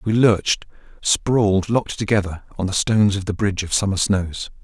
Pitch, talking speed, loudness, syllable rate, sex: 100 Hz, 180 wpm, -20 LUFS, 5.6 syllables/s, male